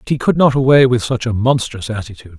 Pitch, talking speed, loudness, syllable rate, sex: 120 Hz, 250 wpm, -15 LUFS, 6.6 syllables/s, male